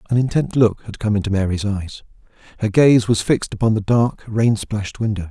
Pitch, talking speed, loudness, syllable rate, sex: 110 Hz, 205 wpm, -18 LUFS, 5.5 syllables/s, male